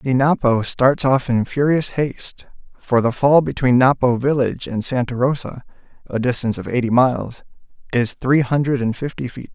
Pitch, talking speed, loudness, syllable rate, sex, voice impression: 130 Hz, 170 wpm, -18 LUFS, 5.0 syllables/s, male, masculine, adult-like, slightly thick, tensed, slightly bright, soft, slightly muffled, intellectual, calm, friendly, reassuring, wild, kind, slightly modest